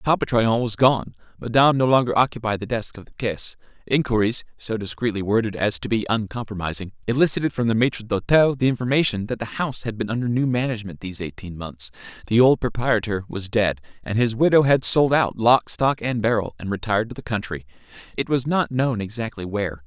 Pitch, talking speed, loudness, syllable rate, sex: 115 Hz, 195 wpm, -22 LUFS, 6.0 syllables/s, male